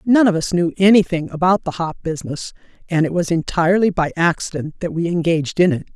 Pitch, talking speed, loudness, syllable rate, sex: 170 Hz, 200 wpm, -18 LUFS, 6.1 syllables/s, female